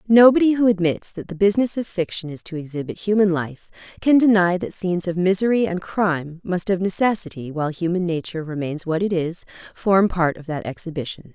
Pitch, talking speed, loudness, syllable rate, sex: 180 Hz, 190 wpm, -21 LUFS, 5.8 syllables/s, female